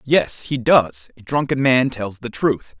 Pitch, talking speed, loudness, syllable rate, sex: 125 Hz, 195 wpm, -19 LUFS, 3.8 syllables/s, male